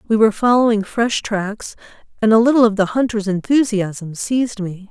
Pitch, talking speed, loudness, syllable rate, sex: 215 Hz, 170 wpm, -17 LUFS, 5.2 syllables/s, female